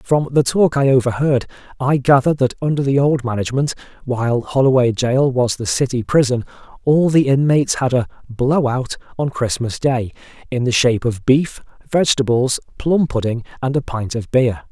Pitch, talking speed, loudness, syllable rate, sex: 130 Hz, 170 wpm, -17 LUFS, 5.2 syllables/s, male